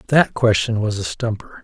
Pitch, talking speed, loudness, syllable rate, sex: 110 Hz, 185 wpm, -19 LUFS, 5.0 syllables/s, male